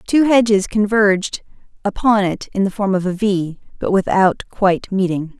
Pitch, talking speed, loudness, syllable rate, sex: 200 Hz, 165 wpm, -17 LUFS, 4.8 syllables/s, female